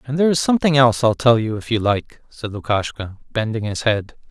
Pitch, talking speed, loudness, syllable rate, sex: 120 Hz, 225 wpm, -19 LUFS, 5.9 syllables/s, male